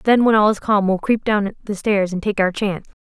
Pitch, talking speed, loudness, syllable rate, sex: 205 Hz, 275 wpm, -18 LUFS, 5.6 syllables/s, female